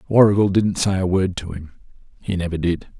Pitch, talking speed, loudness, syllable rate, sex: 95 Hz, 200 wpm, -19 LUFS, 5.8 syllables/s, male